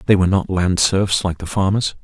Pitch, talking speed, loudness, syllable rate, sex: 95 Hz, 235 wpm, -17 LUFS, 5.4 syllables/s, male